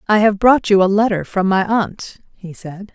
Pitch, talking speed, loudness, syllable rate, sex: 200 Hz, 225 wpm, -15 LUFS, 4.4 syllables/s, female